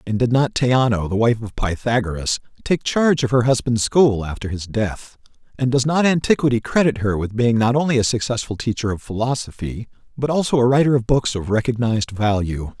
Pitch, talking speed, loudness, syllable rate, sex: 120 Hz, 190 wpm, -19 LUFS, 5.5 syllables/s, male